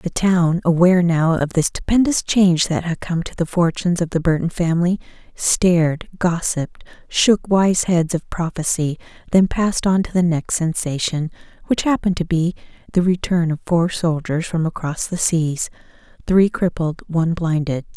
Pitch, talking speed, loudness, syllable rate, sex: 170 Hz, 160 wpm, -19 LUFS, 4.9 syllables/s, female